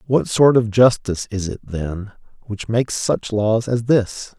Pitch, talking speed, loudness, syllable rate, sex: 110 Hz, 180 wpm, -18 LUFS, 4.2 syllables/s, male